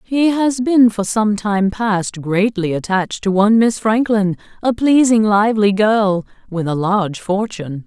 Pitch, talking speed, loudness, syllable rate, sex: 210 Hz, 160 wpm, -16 LUFS, 4.4 syllables/s, female